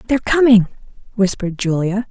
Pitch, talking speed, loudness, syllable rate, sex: 210 Hz, 115 wpm, -16 LUFS, 6.3 syllables/s, female